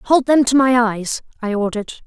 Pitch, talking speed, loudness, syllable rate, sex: 240 Hz, 205 wpm, -17 LUFS, 5.1 syllables/s, female